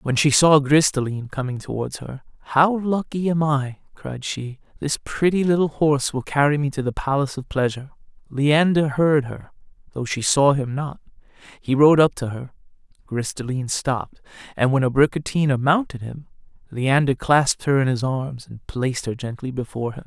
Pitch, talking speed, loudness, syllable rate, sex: 140 Hz, 180 wpm, -21 LUFS, 5.1 syllables/s, male